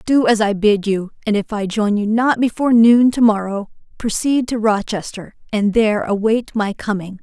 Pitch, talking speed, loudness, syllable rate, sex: 215 Hz, 190 wpm, -17 LUFS, 4.9 syllables/s, female